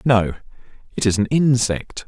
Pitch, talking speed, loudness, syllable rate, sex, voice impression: 115 Hz, 145 wpm, -19 LUFS, 4.7 syllables/s, male, masculine, adult-like, thick, slightly powerful, muffled, slightly intellectual, sincere, calm, mature, slightly friendly, unique, wild, lively, slightly sharp